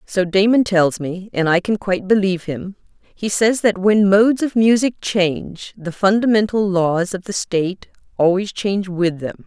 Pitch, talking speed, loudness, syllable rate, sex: 195 Hz, 170 wpm, -17 LUFS, 4.8 syllables/s, female